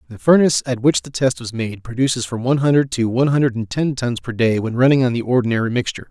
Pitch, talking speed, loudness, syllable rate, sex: 125 Hz, 255 wpm, -18 LUFS, 6.8 syllables/s, male